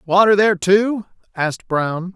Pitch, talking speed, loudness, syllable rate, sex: 190 Hz, 140 wpm, -17 LUFS, 4.7 syllables/s, male